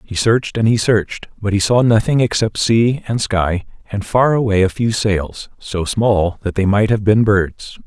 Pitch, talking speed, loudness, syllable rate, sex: 105 Hz, 205 wpm, -16 LUFS, 4.5 syllables/s, male